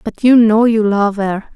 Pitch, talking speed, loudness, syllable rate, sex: 215 Hz, 230 wpm, -13 LUFS, 4.1 syllables/s, female